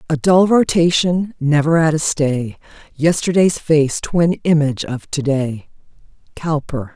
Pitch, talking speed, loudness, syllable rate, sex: 155 Hz, 130 wpm, -16 LUFS, 4.0 syllables/s, female